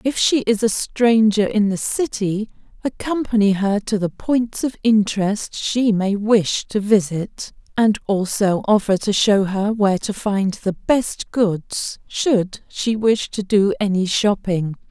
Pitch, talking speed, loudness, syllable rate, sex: 210 Hz, 155 wpm, -19 LUFS, 3.8 syllables/s, female